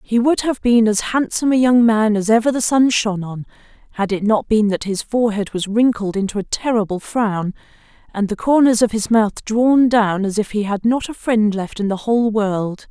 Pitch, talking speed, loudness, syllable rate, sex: 220 Hz, 225 wpm, -17 LUFS, 5.1 syllables/s, female